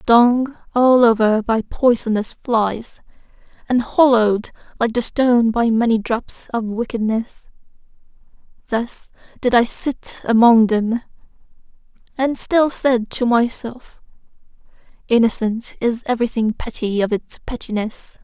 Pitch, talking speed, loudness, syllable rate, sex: 235 Hz, 110 wpm, -18 LUFS, 4.0 syllables/s, female